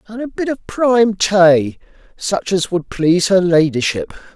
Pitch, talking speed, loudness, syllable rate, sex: 185 Hz, 165 wpm, -15 LUFS, 4.4 syllables/s, male